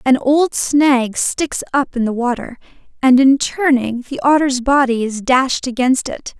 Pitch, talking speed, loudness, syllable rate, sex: 260 Hz, 170 wpm, -15 LUFS, 4.0 syllables/s, female